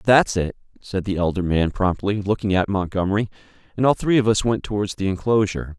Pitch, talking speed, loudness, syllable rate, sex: 100 Hz, 195 wpm, -21 LUFS, 5.9 syllables/s, male